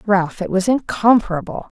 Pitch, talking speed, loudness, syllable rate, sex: 200 Hz, 135 wpm, -17 LUFS, 5.1 syllables/s, female